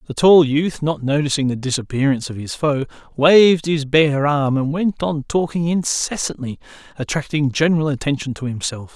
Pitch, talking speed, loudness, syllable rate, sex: 145 Hz, 160 wpm, -18 LUFS, 5.2 syllables/s, male